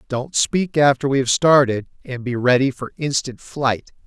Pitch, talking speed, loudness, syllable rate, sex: 135 Hz, 175 wpm, -19 LUFS, 4.6 syllables/s, male